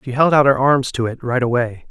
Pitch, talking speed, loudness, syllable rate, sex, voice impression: 130 Hz, 285 wpm, -16 LUFS, 5.6 syllables/s, male, masculine, adult-like, bright, clear, fluent, cool, refreshing, friendly, reassuring, lively, kind